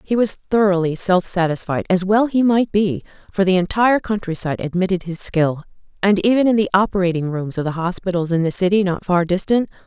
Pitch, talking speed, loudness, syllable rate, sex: 190 Hz, 195 wpm, -18 LUFS, 5.8 syllables/s, female